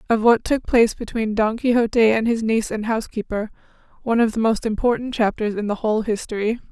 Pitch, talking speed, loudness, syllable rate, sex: 225 Hz, 195 wpm, -20 LUFS, 6.3 syllables/s, female